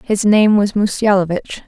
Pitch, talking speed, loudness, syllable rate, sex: 205 Hz, 145 wpm, -15 LUFS, 4.4 syllables/s, female